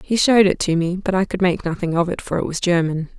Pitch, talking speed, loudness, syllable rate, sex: 180 Hz, 300 wpm, -19 LUFS, 6.4 syllables/s, female